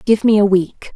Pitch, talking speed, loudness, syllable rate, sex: 205 Hz, 250 wpm, -14 LUFS, 4.8 syllables/s, female